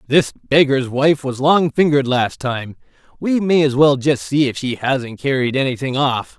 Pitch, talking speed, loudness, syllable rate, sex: 135 Hz, 190 wpm, -17 LUFS, 4.6 syllables/s, male